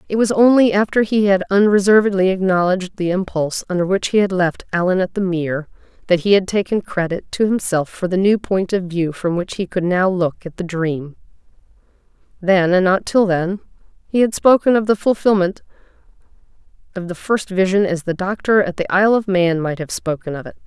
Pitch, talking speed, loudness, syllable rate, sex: 190 Hz, 200 wpm, -17 LUFS, 5.5 syllables/s, female